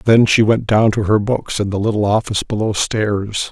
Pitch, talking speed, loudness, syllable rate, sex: 105 Hz, 220 wpm, -16 LUFS, 4.9 syllables/s, male